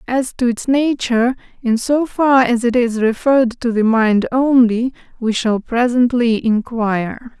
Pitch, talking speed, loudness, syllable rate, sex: 240 Hz, 155 wpm, -16 LUFS, 4.2 syllables/s, female